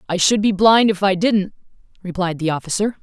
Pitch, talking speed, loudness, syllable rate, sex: 195 Hz, 200 wpm, -17 LUFS, 5.5 syllables/s, female